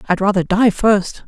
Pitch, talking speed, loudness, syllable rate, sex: 195 Hz, 190 wpm, -15 LUFS, 4.6 syllables/s, female